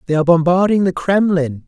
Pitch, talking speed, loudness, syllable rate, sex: 170 Hz, 180 wpm, -15 LUFS, 6.0 syllables/s, male